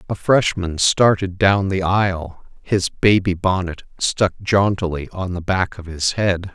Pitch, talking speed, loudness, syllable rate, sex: 95 Hz, 155 wpm, -19 LUFS, 4.0 syllables/s, male